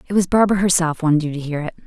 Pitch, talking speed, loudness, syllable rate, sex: 170 Hz, 290 wpm, -18 LUFS, 8.0 syllables/s, female